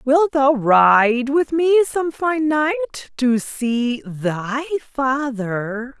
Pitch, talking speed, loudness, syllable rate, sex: 265 Hz, 120 wpm, -18 LUFS, 2.7 syllables/s, female